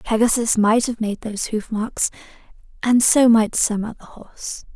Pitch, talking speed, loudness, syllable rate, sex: 225 Hz, 165 wpm, -19 LUFS, 4.6 syllables/s, female